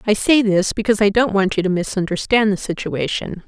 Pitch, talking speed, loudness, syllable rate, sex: 200 Hz, 205 wpm, -18 LUFS, 5.7 syllables/s, female